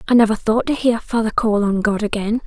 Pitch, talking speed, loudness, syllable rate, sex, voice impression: 220 Hz, 245 wpm, -18 LUFS, 5.7 syllables/s, female, feminine, slightly young, powerful, bright, soft, slightly clear, raspy, slightly cute, slightly intellectual, calm, friendly, kind, modest